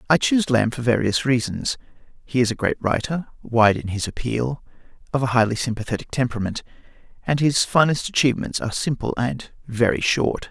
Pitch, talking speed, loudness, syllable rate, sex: 125 Hz, 165 wpm, -21 LUFS, 5.6 syllables/s, male